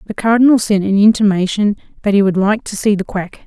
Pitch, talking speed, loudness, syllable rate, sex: 205 Hz, 225 wpm, -14 LUFS, 6.0 syllables/s, female